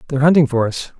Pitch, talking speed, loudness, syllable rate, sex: 140 Hz, 240 wpm, -15 LUFS, 8.1 syllables/s, male